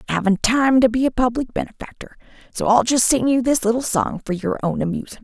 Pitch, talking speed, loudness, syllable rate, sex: 235 Hz, 220 wpm, -19 LUFS, 6.1 syllables/s, female